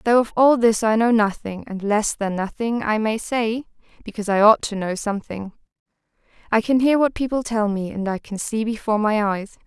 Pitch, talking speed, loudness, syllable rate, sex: 220 Hz, 210 wpm, -20 LUFS, 4.5 syllables/s, female